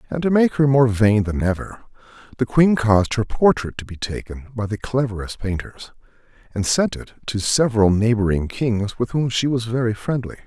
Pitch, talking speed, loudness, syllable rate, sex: 115 Hz, 190 wpm, -20 LUFS, 5.2 syllables/s, male